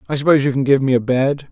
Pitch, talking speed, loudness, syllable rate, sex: 135 Hz, 315 wpm, -16 LUFS, 7.6 syllables/s, male